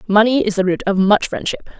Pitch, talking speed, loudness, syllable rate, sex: 205 Hz, 235 wpm, -16 LUFS, 5.9 syllables/s, female